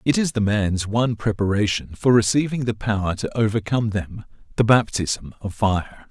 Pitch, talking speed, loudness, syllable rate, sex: 110 Hz, 165 wpm, -21 LUFS, 5.0 syllables/s, male